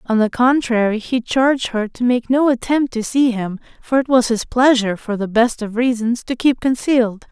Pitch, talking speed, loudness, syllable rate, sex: 240 Hz, 215 wpm, -17 LUFS, 5.0 syllables/s, female